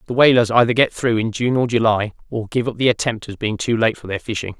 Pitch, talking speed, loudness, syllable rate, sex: 115 Hz, 275 wpm, -18 LUFS, 6.1 syllables/s, male